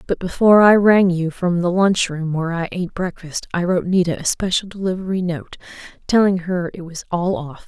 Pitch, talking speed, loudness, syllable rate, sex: 180 Hz, 205 wpm, -18 LUFS, 5.5 syllables/s, female